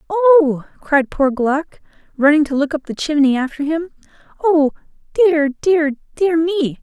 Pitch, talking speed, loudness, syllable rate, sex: 300 Hz, 150 wpm, -16 LUFS, 4.0 syllables/s, female